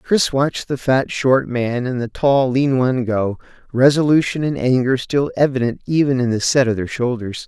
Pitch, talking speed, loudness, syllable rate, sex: 130 Hz, 195 wpm, -18 LUFS, 4.9 syllables/s, male